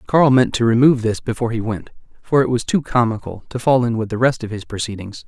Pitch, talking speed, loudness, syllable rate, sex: 120 Hz, 250 wpm, -18 LUFS, 6.2 syllables/s, male